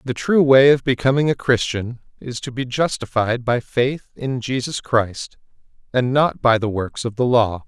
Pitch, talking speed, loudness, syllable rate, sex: 125 Hz, 190 wpm, -19 LUFS, 4.4 syllables/s, male